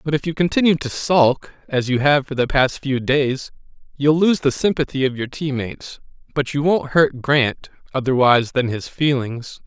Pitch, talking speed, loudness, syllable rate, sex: 140 Hz, 180 wpm, -19 LUFS, 4.8 syllables/s, male